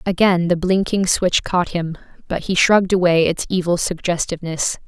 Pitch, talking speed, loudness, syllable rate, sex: 175 Hz, 160 wpm, -18 LUFS, 5.0 syllables/s, female